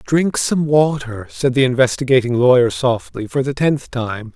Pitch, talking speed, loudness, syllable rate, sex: 130 Hz, 165 wpm, -17 LUFS, 4.6 syllables/s, male